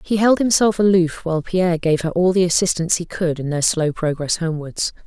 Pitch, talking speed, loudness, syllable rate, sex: 175 Hz, 215 wpm, -18 LUFS, 5.8 syllables/s, female